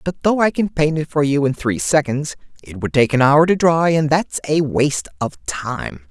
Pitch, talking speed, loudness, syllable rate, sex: 145 Hz, 235 wpm, -17 LUFS, 4.8 syllables/s, male